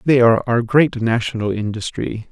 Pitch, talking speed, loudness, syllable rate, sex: 115 Hz, 155 wpm, -18 LUFS, 5.0 syllables/s, male